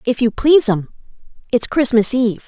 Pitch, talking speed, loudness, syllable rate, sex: 240 Hz, 145 wpm, -16 LUFS, 5.1 syllables/s, female